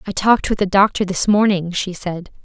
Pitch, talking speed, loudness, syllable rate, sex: 190 Hz, 220 wpm, -17 LUFS, 5.5 syllables/s, female